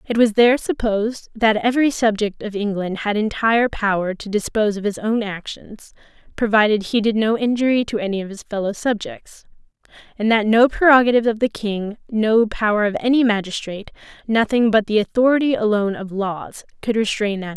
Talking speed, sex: 180 wpm, female